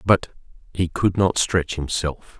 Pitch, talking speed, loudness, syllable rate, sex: 85 Hz, 150 wpm, -22 LUFS, 3.7 syllables/s, male